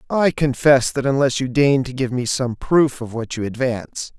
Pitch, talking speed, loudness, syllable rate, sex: 130 Hz, 215 wpm, -19 LUFS, 4.8 syllables/s, male